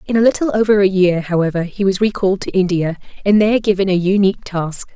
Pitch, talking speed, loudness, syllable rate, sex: 195 Hz, 220 wpm, -16 LUFS, 6.4 syllables/s, female